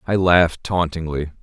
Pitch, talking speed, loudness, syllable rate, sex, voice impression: 85 Hz, 125 wpm, -19 LUFS, 5.3 syllables/s, male, masculine, very adult-like, slightly thick, cool, slightly intellectual, calm, slightly wild